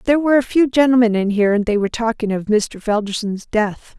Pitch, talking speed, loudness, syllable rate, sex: 225 Hz, 225 wpm, -17 LUFS, 6.3 syllables/s, female